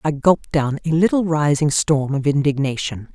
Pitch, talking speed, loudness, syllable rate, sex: 150 Hz, 170 wpm, -18 LUFS, 5.0 syllables/s, female